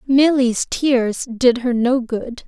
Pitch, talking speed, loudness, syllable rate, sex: 245 Hz, 145 wpm, -17 LUFS, 3.1 syllables/s, female